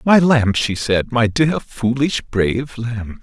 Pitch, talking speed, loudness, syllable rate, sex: 120 Hz, 170 wpm, -18 LUFS, 3.5 syllables/s, male